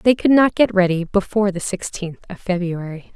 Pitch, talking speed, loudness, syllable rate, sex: 195 Hz, 190 wpm, -19 LUFS, 5.3 syllables/s, female